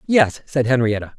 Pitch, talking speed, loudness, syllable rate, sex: 130 Hz, 150 wpm, -19 LUFS, 5.2 syllables/s, male